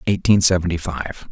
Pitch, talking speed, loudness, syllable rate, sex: 90 Hz, 135 wpm, -18 LUFS, 3.0 syllables/s, male